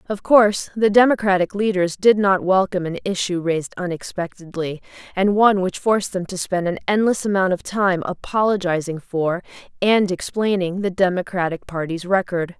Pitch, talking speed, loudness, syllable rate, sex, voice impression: 190 Hz, 150 wpm, -20 LUFS, 5.2 syllables/s, female, very feminine, very adult-like, slightly thin, tensed, slightly powerful, slightly dark, slightly hard, clear, fluent, cool, intellectual, refreshing, very sincere, calm, very friendly, reassuring, unique, elegant, wild, slightly sweet, lively, strict, slightly intense